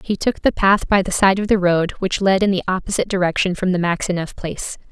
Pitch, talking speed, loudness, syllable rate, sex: 190 Hz, 245 wpm, -18 LUFS, 6.1 syllables/s, female